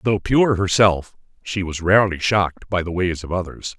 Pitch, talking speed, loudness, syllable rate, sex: 95 Hz, 190 wpm, -19 LUFS, 5.0 syllables/s, male